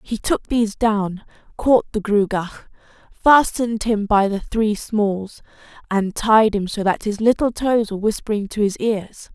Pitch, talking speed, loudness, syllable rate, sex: 215 Hz, 165 wpm, -19 LUFS, 4.4 syllables/s, female